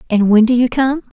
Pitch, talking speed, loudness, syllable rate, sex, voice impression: 240 Hz, 255 wpm, -13 LUFS, 5.9 syllables/s, female, feminine, adult-like, relaxed, bright, soft, raspy, intellectual, friendly, reassuring, elegant, kind, modest